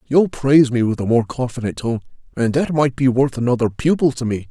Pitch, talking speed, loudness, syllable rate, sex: 130 Hz, 225 wpm, -18 LUFS, 5.7 syllables/s, male